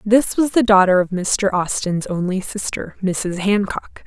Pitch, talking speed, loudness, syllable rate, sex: 195 Hz, 165 wpm, -18 LUFS, 4.1 syllables/s, female